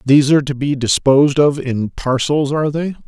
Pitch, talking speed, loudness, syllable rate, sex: 140 Hz, 195 wpm, -15 LUFS, 5.6 syllables/s, male